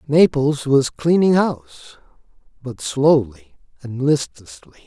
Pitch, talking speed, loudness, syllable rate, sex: 140 Hz, 100 wpm, -17 LUFS, 4.1 syllables/s, male